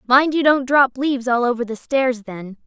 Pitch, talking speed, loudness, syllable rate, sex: 255 Hz, 225 wpm, -18 LUFS, 4.9 syllables/s, female